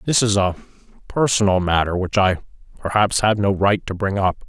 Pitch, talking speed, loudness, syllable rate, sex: 100 Hz, 190 wpm, -19 LUFS, 5.2 syllables/s, male